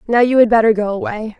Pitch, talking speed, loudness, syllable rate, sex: 225 Hz, 260 wpm, -14 LUFS, 6.5 syllables/s, female